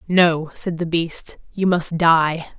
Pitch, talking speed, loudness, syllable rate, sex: 170 Hz, 160 wpm, -19 LUFS, 3.2 syllables/s, female